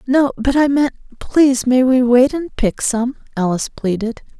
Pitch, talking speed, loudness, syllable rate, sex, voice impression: 255 Hz, 165 wpm, -16 LUFS, 4.7 syllables/s, female, very feminine, adult-like, friendly, reassuring, kind